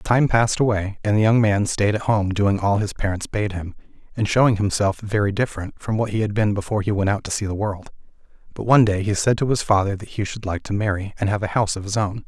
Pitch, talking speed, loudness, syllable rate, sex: 105 Hz, 270 wpm, -21 LUFS, 6.2 syllables/s, male